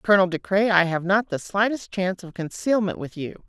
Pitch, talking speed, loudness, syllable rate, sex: 190 Hz, 225 wpm, -23 LUFS, 5.5 syllables/s, female